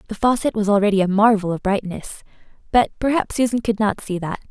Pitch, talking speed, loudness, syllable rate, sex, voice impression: 210 Hz, 200 wpm, -19 LUFS, 6.1 syllables/s, female, feminine, adult-like, relaxed, bright, soft, clear, slightly raspy, cute, calm, elegant, lively, kind